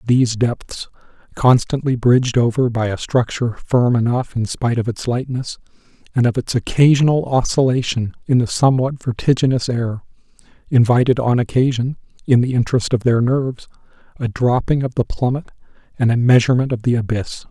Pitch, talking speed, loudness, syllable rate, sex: 125 Hz, 155 wpm, -17 LUFS, 5.5 syllables/s, male